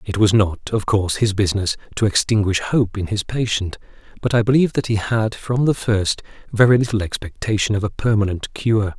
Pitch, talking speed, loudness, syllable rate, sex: 105 Hz, 195 wpm, -19 LUFS, 5.5 syllables/s, male